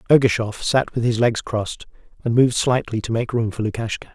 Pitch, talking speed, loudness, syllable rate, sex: 115 Hz, 205 wpm, -21 LUFS, 5.9 syllables/s, male